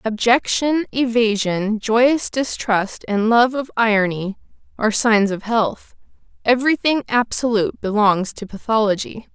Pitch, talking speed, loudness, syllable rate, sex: 225 Hz, 110 wpm, -18 LUFS, 4.3 syllables/s, female